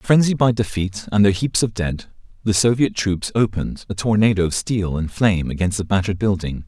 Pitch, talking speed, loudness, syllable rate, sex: 100 Hz, 200 wpm, -19 LUFS, 5.5 syllables/s, male